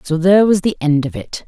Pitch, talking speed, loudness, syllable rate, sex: 175 Hz, 285 wpm, -14 LUFS, 6.0 syllables/s, female